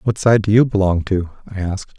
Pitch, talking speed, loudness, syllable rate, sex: 100 Hz, 240 wpm, -17 LUFS, 5.8 syllables/s, male